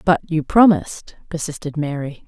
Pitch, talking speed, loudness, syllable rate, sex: 155 Hz, 130 wpm, -18 LUFS, 5.1 syllables/s, female